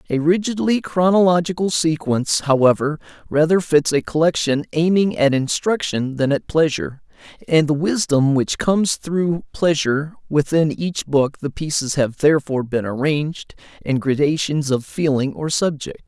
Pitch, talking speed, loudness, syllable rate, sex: 155 Hz, 135 wpm, -19 LUFS, 4.8 syllables/s, male